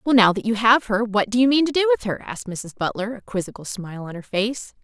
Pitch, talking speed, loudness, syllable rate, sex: 225 Hz, 285 wpm, -21 LUFS, 6.2 syllables/s, female